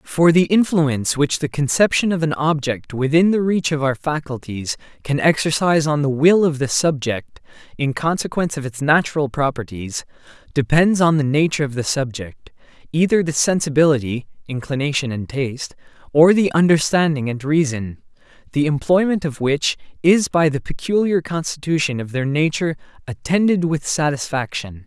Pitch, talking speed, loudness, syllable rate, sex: 150 Hz, 150 wpm, -19 LUFS, 5.0 syllables/s, male